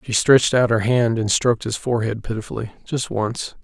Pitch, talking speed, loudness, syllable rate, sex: 115 Hz, 180 wpm, -20 LUFS, 5.7 syllables/s, male